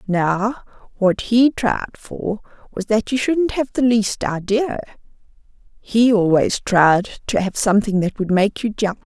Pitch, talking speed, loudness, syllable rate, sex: 215 Hz, 160 wpm, -18 LUFS, 4.0 syllables/s, female